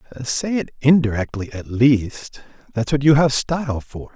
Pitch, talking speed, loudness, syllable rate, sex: 130 Hz, 160 wpm, -19 LUFS, 4.5 syllables/s, male